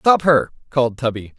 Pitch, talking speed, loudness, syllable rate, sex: 135 Hz, 175 wpm, -18 LUFS, 5.2 syllables/s, male